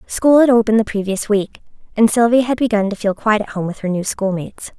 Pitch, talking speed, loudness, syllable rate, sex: 215 Hz, 240 wpm, -16 LUFS, 6.4 syllables/s, female